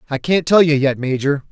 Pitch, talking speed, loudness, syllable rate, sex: 145 Hz, 240 wpm, -16 LUFS, 5.5 syllables/s, male